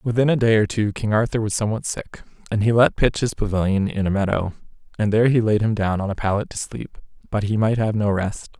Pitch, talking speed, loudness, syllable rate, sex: 105 Hz, 250 wpm, -21 LUFS, 6.1 syllables/s, male